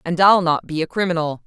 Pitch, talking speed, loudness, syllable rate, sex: 170 Hz, 245 wpm, -18 LUFS, 5.9 syllables/s, female